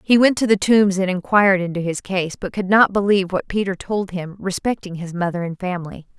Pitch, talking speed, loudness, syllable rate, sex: 190 Hz, 225 wpm, -19 LUFS, 5.7 syllables/s, female